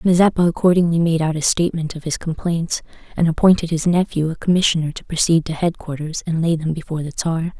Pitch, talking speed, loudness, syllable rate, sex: 165 Hz, 205 wpm, -19 LUFS, 6.2 syllables/s, female